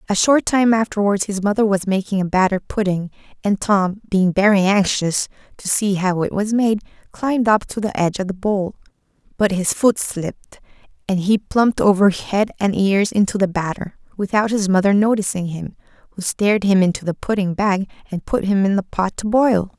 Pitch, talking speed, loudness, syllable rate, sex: 200 Hz, 195 wpm, -18 LUFS, 5.2 syllables/s, female